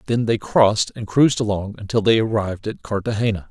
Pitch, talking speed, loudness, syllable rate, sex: 105 Hz, 190 wpm, -20 LUFS, 6.1 syllables/s, male